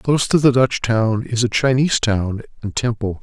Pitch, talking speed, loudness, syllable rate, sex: 120 Hz, 205 wpm, -18 LUFS, 5.0 syllables/s, male